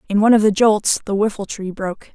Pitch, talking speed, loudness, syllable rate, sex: 205 Hz, 250 wpm, -17 LUFS, 6.3 syllables/s, female